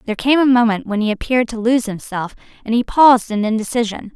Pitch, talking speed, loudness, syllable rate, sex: 230 Hz, 215 wpm, -16 LUFS, 6.5 syllables/s, female